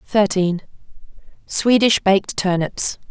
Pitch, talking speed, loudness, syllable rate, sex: 195 Hz, 60 wpm, -18 LUFS, 3.9 syllables/s, female